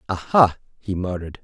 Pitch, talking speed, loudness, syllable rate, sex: 100 Hz, 125 wpm, -21 LUFS, 5.7 syllables/s, male